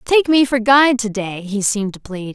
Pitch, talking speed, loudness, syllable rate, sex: 230 Hz, 255 wpm, -16 LUFS, 5.2 syllables/s, female